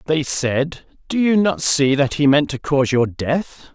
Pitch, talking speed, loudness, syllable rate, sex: 150 Hz, 210 wpm, -18 LUFS, 4.3 syllables/s, male